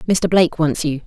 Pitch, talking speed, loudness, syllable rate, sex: 160 Hz, 225 wpm, -17 LUFS, 5.7 syllables/s, female